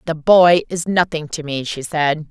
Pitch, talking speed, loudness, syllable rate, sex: 160 Hz, 210 wpm, -17 LUFS, 4.4 syllables/s, female